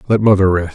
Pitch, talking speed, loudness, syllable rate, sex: 95 Hz, 240 wpm, -13 LUFS, 6.5 syllables/s, male